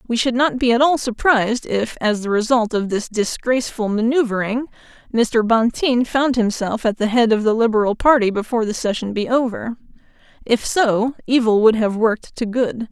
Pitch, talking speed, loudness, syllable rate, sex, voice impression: 230 Hz, 180 wpm, -18 LUFS, 5.0 syllables/s, female, feminine, adult-like, slightly powerful, slightly unique, slightly sharp